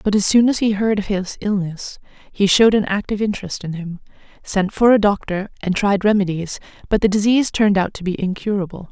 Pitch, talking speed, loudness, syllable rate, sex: 200 Hz, 210 wpm, -18 LUFS, 6.0 syllables/s, female